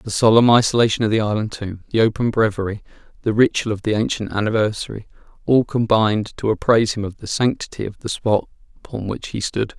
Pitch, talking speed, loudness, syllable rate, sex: 110 Hz, 190 wpm, -19 LUFS, 6.1 syllables/s, male